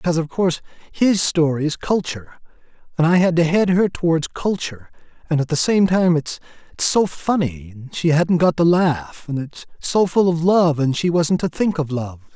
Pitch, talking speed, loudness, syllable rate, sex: 165 Hz, 205 wpm, -19 LUFS, 5.1 syllables/s, male